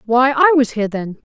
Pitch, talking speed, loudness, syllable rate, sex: 250 Hz, 230 wpm, -15 LUFS, 5.7 syllables/s, female